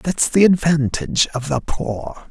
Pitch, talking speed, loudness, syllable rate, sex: 145 Hz, 155 wpm, -18 LUFS, 4.2 syllables/s, male